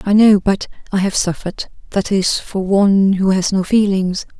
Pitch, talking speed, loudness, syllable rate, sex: 195 Hz, 190 wpm, -16 LUFS, 4.8 syllables/s, female